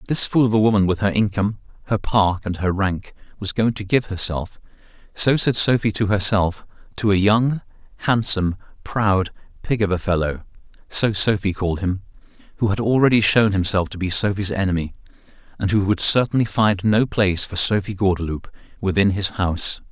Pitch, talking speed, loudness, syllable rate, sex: 100 Hz, 165 wpm, -20 LUFS, 5.4 syllables/s, male